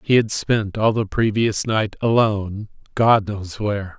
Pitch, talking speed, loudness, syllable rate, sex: 105 Hz, 165 wpm, -20 LUFS, 4.2 syllables/s, male